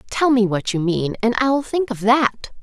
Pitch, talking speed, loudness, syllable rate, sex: 235 Hz, 230 wpm, -19 LUFS, 4.5 syllables/s, female